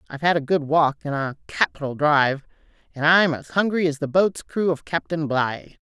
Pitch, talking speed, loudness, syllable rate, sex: 155 Hz, 205 wpm, -21 LUFS, 5.2 syllables/s, female